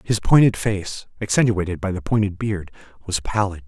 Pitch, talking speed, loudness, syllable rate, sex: 100 Hz, 165 wpm, -21 LUFS, 5.2 syllables/s, male